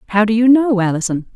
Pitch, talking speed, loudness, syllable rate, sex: 215 Hz, 220 wpm, -14 LUFS, 6.7 syllables/s, female